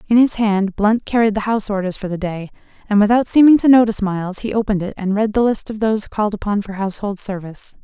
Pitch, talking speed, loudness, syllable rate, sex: 210 Hz, 235 wpm, -17 LUFS, 6.6 syllables/s, female